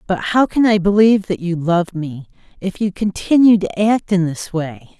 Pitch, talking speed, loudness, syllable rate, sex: 190 Hz, 205 wpm, -16 LUFS, 4.7 syllables/s, female